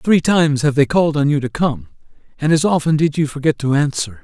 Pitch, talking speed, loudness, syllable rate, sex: 145 Hz, 240 wpm, -16 LUFS, 6.0 syllables/s, male